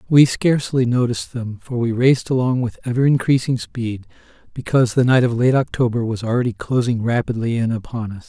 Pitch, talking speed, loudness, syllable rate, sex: 120 Hz, 180 wpm, -19 LUFS, 5.8 syllables/s, male